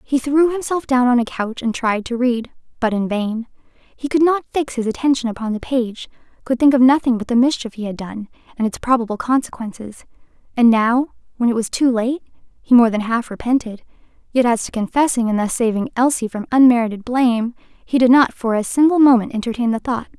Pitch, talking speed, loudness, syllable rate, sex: 245 Hz, 205 wpm, -18 LUFS, 5.6 syllables/s, female